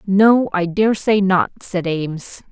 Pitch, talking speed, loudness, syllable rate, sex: 190 Hz, 165 wpm, -17 LUFS, 3.6 syllables/s, female